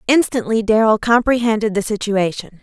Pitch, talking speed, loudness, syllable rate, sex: 220 Hz, 115 wpm, -16 LUFS, 5.3 syllables/s, female